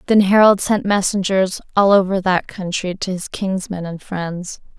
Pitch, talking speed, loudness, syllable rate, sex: 190 Hz, 165 wpm, -17 LUFS, 4.4 syllables/s, female